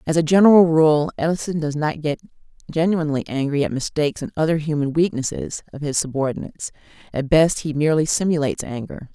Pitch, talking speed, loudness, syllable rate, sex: 155 Hz, 165 wpm, -20 LUFS, 6.2 syllables/s, female